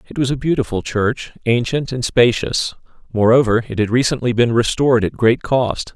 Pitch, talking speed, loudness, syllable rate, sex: 120 Hz, 170 wpm, -17 LUFS, 5.2 syllables/s, male